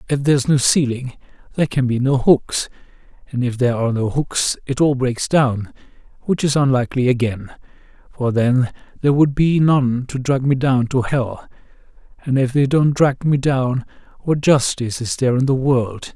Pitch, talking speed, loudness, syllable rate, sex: 130 Hz, 180 wpm, -18 LUFS, 5.0 syllables/s, male